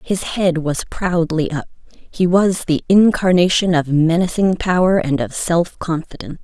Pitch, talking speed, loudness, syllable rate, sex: 170 Hz, 150 wpm, -17 LUFS, 4.5 syllables/s, female